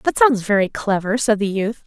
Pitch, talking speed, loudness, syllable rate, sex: 210 Hz, 225 wpm, -18 LUFS, 4.9 syllables/s, female